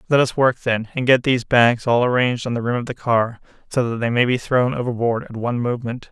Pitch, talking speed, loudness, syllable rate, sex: 120 Hz, 255 wpm, -19 LUFS, 6.1 syllables/s, male